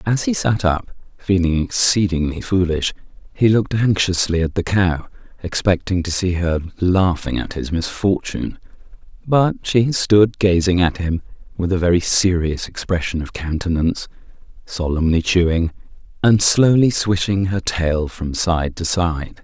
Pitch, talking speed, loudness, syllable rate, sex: 90 Hz, 140 wpm, -18 LUFS, 4.5 syllables/s, male